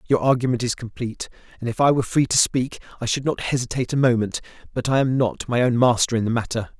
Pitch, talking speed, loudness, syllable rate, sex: 120 Hz, 240 wpm, -21 LUFS, 6.6 syllables/s, male